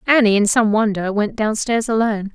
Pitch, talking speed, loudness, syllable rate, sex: 215 Hz, 180 wpm, -17 LUFS, 5.5 syllables/s, female